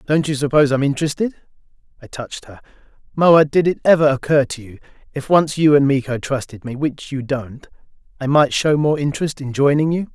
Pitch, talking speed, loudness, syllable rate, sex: 145 Hz, 185 wpm, -17 LUFS, 5.8 syllables/s, male